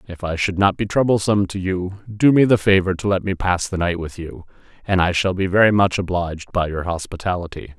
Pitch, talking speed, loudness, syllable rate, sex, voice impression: 95 Hz, 230 wpm, -19 LUFS, 5.8 syllables/s, male, very masculine, very adult-like, middle-aged, very thick, very tensed, very powerful, slightly bright, hard, slightly muffled, fluent, slightly raspy, very cool, very intellectual, very sincere, very calm, very mature, friendly, reassuring, slightly unique, very elegant, slightly wild, slightly lively, kind, slightly modest